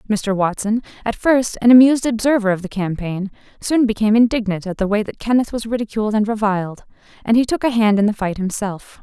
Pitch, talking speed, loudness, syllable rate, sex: 215 Hz, 205 wpm, -18 LUFS, 6.1 syllables/s, female